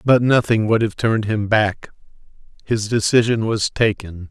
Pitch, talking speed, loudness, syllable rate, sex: 110 Hz, 155 wpm, -18 LUFS, 4.6 syllables/s, male